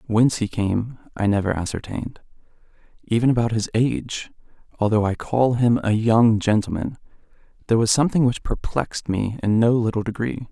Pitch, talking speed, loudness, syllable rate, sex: 115 Hz, 145 wpm, -21 LUFS, 5.6 syllables/s, male